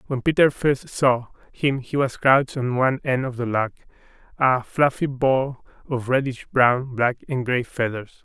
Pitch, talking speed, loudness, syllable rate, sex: 130 Hz, 175 wpm, -22 LUFS, 4.4 syllables/s, male